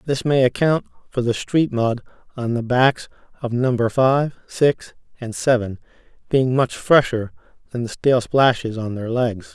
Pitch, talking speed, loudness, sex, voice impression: 125 Hz, 165 wpm, -20 LUFS, male, masculine, very adult-like, slightly thick, slightly soft, sincere, calm, friendly, slightly kind